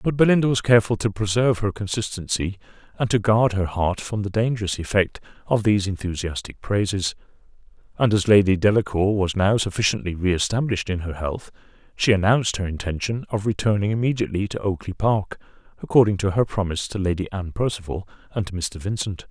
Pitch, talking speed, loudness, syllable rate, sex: 100 Hz, 170 wpm, -22 LUFS, 6.1 syllables/s, male